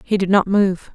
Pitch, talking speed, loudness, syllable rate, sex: 195 Hz, 255 wpm, -17 LUFS, 4.7 syllables/s, female